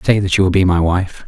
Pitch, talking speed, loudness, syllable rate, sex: 95 Hz, 330 wpm, -15 LUFS, 6.1 syllables/s, male